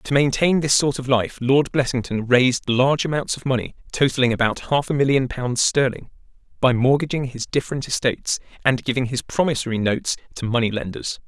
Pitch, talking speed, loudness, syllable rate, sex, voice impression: 130 Hz, 175 wpm, -20 LUFS, 5.7 syllables/s, male, masculine, adult-like, tensed, powerful, clear, fluent, intellectual, wild, lively, strict, slightly intense, light